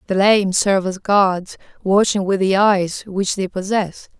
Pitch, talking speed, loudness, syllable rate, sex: 195 Hz, 170 wpm, -17 LUFS, 4.1 syllables/s, female